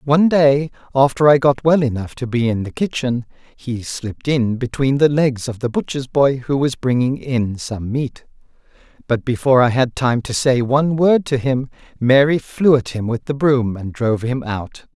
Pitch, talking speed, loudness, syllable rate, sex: 130 Hz, 200 wpm, -17 LUFS, 4.8 syllables/s, male